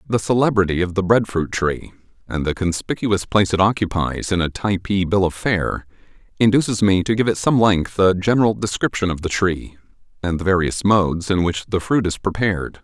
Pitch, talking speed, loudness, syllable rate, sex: 95 Hz, 195 wpm, -19 LUFS, 5.4 syllables/s, male